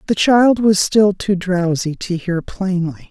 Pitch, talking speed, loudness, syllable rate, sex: 190 Hz, 175 wpm, -16 LUFS, 3.8 syllables/s, female